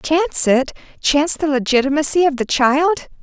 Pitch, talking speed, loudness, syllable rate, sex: 290 Hz, 150 wpm, -16 LUFS, 5.1 syllables/s, female